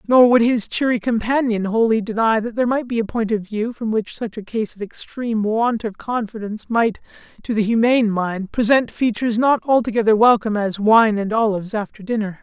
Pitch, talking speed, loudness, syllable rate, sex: 220 Hz, 200 wpm, -19 LUFS, 5.6 syllables/s, male